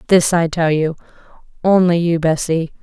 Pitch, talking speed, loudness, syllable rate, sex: 165 Hz, 125 wpm, -16 LUFS, 4.7 syllables/s, female